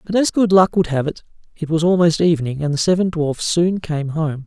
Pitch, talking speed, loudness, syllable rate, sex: 165 Hz, 240 wpm, -18 LUFS, 5.4 syllables/s, male